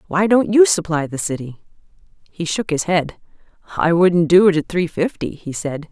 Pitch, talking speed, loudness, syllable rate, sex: 170 Hz, 195 wpm, -17 LUFS, 4.9 syllables/s, female